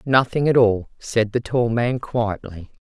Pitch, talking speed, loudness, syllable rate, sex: 115 Hz, 170 wpm, -20 LUFS, 3.9 syllables/s, female